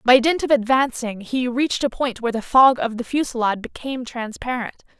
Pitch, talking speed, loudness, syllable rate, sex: 245 Hz, 190 wpm, -20 LUFS, 5.8 syllables/s, female